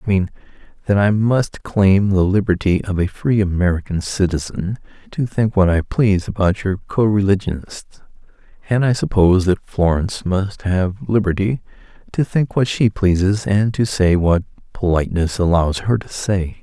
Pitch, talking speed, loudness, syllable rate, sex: 100 Hz, 160 wpm, -18 LUFS, 4.8 syllables/s, male